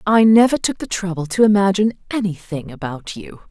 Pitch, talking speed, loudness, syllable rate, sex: 195 Hz, 170 wpm, -17 LUFS, 5.6 syllables/s, female